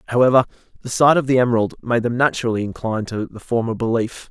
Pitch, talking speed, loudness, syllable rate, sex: 120 Hz, 195 wpm, -19 LUFS, 6.9 syllables/s, male